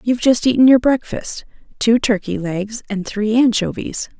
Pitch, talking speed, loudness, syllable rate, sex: 225 Hz, 145 wpm, -17 LUFS, 4.8 syllables/s, female